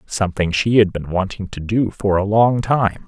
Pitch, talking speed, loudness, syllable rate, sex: 100 Hz, 215 wpm, -18 LUFS, 4.8 syllables/s, male